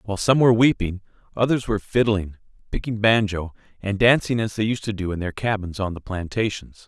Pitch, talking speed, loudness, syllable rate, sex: 105 Hz, 190 wpm, -22 LUFS, 5.7 syllables/s, male